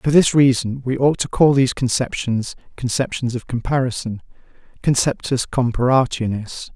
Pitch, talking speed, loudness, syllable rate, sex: 125 Hz, 125 wpm, -19 LUFS, 4.1 syllables/s, male